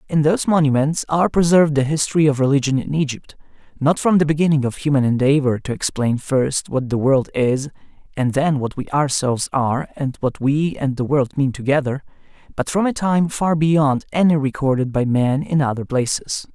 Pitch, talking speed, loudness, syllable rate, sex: 140 Hz, 190 wpm, -18 LUFS, 5.4 syllables/s, male